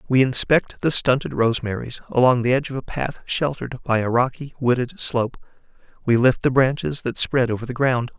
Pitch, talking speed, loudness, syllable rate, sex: 125 Hz, 190 wpm, -21 LUFS, 5.5 syllables/s, male